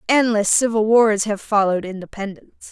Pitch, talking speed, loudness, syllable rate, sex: 210 Hz, 130 wpm, -18 LUFS, 5.5 syllables/s, female